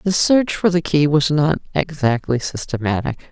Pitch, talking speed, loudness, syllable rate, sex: 150 Hz, 165 wpm, -18 LUFS, 4.6 syllables/s, female